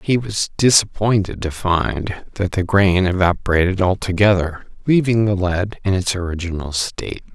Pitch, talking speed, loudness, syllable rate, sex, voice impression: 95 Hz, 140 wpm, -18 LUFS, 4.7 syllables/s, male, very masculine, very adult-like, very middle-aged, thick, slightly tensed, slightly powerful, slightly bright, slightly hard, slightly muffled, cool, very intellectual, refreshing, sincere, very calm, slightly mature, friendly, reassuring, slightly unique, elegant, slightly wild, lively, very kind, very modest